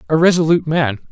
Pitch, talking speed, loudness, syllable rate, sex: 155 Hz, 160 wpm, -15 LUFS, 7.0 syllables/s, male